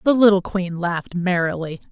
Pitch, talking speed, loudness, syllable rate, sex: 180 Hz, 155 wpm, -20 LUFS, 5.2 syllables/s, female